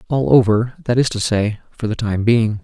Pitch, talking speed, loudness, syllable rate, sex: 110 Hz, 225 wpm, -17 LUFS, 5.0 syllables/s, male